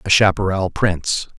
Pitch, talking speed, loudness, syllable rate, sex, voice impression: 95 Hz, 130 wpm, -18 LUFS, 4.9 syllables/s, male, very masculine, very adult-like, old, very thick, slightly tensed, powerful, slightly bright, slightly hard, muffled, slightly fluent, slightly raspy, very cool, intellectual, sincere, very calm, very mature, friendly, very reassuring, unique, slightly elegant, very wild, slightly sweet, lively, kind, slightly modest